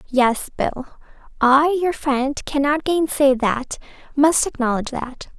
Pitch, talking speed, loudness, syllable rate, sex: 275 Hz, 120 wpm, -19 LUFS, 3.8 syllables/s, female